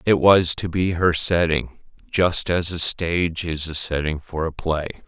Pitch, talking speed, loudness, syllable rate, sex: 85 Hz, 190 wpm, -21 LUFS, 4.3 syllables/s, male